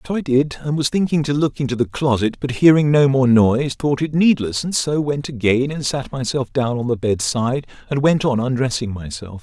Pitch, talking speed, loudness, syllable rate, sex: 135 Hz, 230 wpm, -18 LUFS, 5.2 syllables/s, male